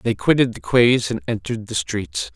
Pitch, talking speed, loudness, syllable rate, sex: 115 Hz, 205 wpm, -20 LUFS, 4.9 syllables/s, male